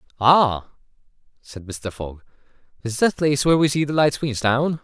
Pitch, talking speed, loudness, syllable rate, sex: 130 Hz, 160 wpm, -20 LUFS, 5.1 syllables/s, male